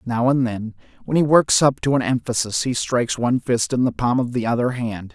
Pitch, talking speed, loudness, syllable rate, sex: 125 Hz, 235 wpm, -20 LUFS, 5.3 syllables/s, male